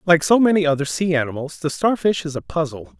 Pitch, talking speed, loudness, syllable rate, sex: 155 Hz, 220 wpm, -19 LUFS, 6.1 syllables/s, male